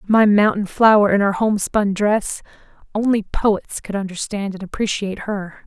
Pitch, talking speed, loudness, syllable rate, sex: 205 Hz, 140 wpm, -19 LUFS, 4.7 syllables/s, female